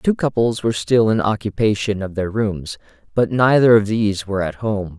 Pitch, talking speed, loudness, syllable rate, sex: 110 Hz, 195 wpm, -18 LUFS, 5.2 syllables/s, male